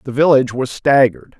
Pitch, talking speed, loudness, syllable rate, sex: 135 Hz, 175 wpm, -14 LUFS, 6.4 syllables/s, male